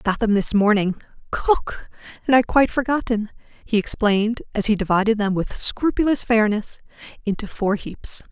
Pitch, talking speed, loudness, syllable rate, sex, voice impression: 220 Hz, 160 wpm, -20 LUFS, 5.1 syllables/s, female, feminine, adult-like, tensed, powerful, clear, fluent, intellectual, slightly friendly, elegant, lively, slightly intense